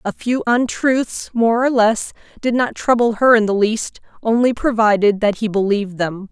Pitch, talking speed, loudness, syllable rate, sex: 225 Hz, 180 wpm, -17 LUFS, 4.6 syllables/s, female